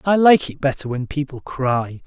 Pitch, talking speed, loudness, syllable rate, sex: 145 Hz, 205 wpm, -19 LUFS, 4.6 syllables/s, male